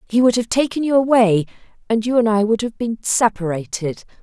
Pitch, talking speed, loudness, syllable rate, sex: 225 Hz, 200 wpm, -18 LUFS, 5.6 syllables/s, female